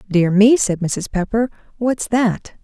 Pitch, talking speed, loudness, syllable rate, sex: 210 Hz, 160 wpm, -17 LUFS, 3.8 syllables/s, female